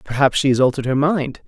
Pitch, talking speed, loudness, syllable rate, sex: 140 Hz, 245 wpm, -18 LUFS, 6.6 syllables/s, male